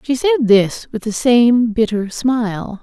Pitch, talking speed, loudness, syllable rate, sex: 230 Hz, 170 wpm, -15 LUFS, 3.8 syllables/s, female